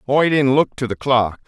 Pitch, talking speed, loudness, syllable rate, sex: 130 Hz, 245 wpm, -17 LUFS, 4.8 syllables/s, male